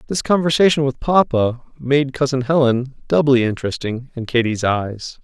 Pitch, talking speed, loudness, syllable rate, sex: 130 Hz, 140 wpm, -18 LUFS, 4.9 syllables/s, male